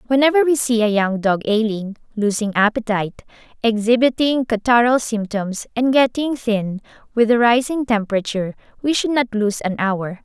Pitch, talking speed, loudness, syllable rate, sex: 225 Hz, 150 wpm, -18 LUFS, 5.1 syllables/s, female